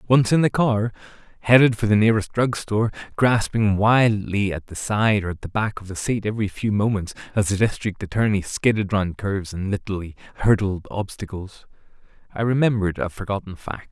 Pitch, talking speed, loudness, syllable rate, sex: 105 Hz, 175 wpm, -22 LUFS, 5.7 syllables/s, male